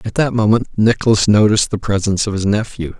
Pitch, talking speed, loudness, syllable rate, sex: 105 Hz, 200 wpm, -15 LUFS, 6.4 syllables/s, male